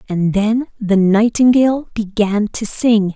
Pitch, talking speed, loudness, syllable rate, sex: 215 Hz, 135 wpm, -15 LUFS, 3.9 syllables/s, female